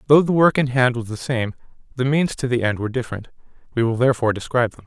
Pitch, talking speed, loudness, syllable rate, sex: 125 Hz, 245 wpm, -20 LUFS, 7.3 syllables/s, male